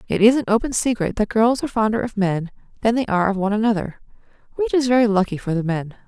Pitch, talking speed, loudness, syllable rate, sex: 215 Hz, 225 wpm, -20 LUFS, 6.9 syllables/s, female